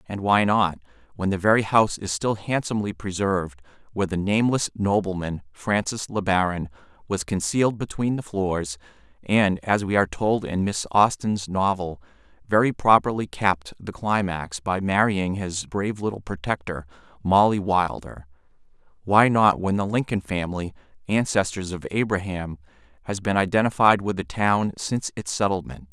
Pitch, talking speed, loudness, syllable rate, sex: 95 Hz, 145 wpm, -23 LUFS, 5.0 syllables/s, male